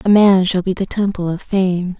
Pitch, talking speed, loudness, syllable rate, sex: 190 Hz, 240 wpm, -16 LUFS, 4.8 syllables/s, female